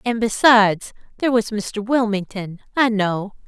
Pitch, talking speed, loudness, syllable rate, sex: 215 Hz, 140 wpm, -19 LUFS, 4.6 syllables/s, female